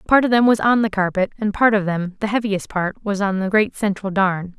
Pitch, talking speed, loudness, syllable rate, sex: 205 Hz, 235 wpm, -19 LUFS, 5.3 syllables/s, female